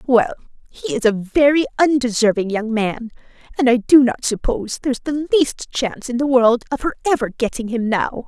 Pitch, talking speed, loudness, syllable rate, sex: 245 Hz, 180 wpm, -18 LUFS, 5.3 syllables/s, female